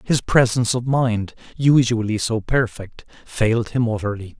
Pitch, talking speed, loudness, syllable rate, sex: 115 Hz, 135 wpm, -20 LUFS, 4.7 syllables/s, male